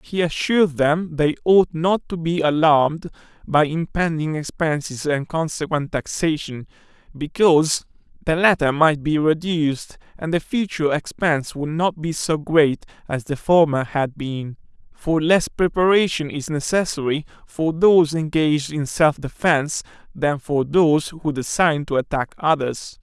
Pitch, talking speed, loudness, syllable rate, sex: 155 Hz, 140 wpm, -20 LUFS, 4.5 syllables/s, male